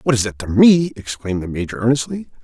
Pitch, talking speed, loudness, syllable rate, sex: 120 Hz, 220 wpm, -18 LUFS, 6.4 syllables/s, male